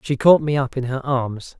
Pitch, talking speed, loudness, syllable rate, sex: 135 Hz, 265 wpm, -19 LUFS, 4.7 syllables/s, male